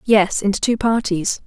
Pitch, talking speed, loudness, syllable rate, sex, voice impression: 205 Hz, 165 wpm, -18 LUFS, 4.5 syllables/s, female, feminine, slightly adult-like, slightly fluent, slightly refreshing, sincere